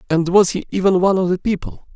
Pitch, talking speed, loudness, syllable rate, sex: 185 Hz, 245 wpm, -17 LUFS, 6.7 syllables/s, male